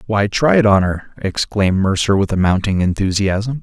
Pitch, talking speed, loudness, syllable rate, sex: 100 Hz, 165 wpm, -16 LUFS, 4.8 syllables/s, male